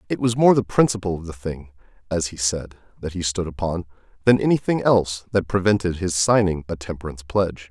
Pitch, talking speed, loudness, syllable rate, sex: 90 Hz, 200 wpm, -21 LUFS, 6.0 syllables/s, male